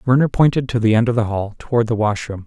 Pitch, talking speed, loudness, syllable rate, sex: 115 Hz, 270 wpm, -18 LUFS, 6.5 syllables/s, male